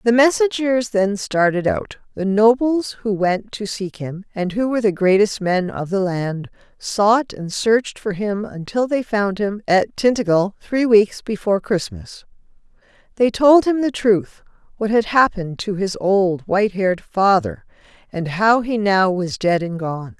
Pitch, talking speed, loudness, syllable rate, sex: 205 Hz, 170 wpm, -18 LUFS, 4.3 syllables/s, female